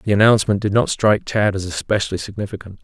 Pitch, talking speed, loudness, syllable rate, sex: 100 Hz, 190 wpm, -18 LUFS, 6.8 syllables/s, male